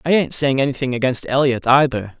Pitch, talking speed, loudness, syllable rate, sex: 130 Hz, 190 wpm, -17 LUFS, 5.8 syllables/s, male